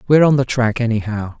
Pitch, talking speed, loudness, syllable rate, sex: 120 Hz, 215 wpm, -16 LUFS, 6.7 syllables/s, male